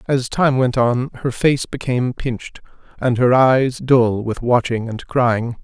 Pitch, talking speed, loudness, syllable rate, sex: 125 Hz, 170 wpm, -18 LUFS, 4.0 syllables/s, male